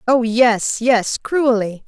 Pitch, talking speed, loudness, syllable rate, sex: 235 Hz, 130 wpm, -16 LUFS, 3.0 syllables/s, female